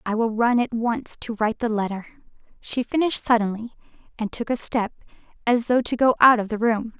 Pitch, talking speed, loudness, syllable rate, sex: 230 Hz, 205 wpm, -22 LUFS, 5.6 syllables/s, female